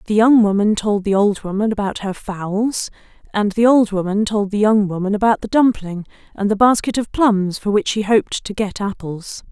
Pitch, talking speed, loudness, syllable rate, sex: 205 Hz, 210 wpm, -17 LUFS, 5.0 syllables/s, female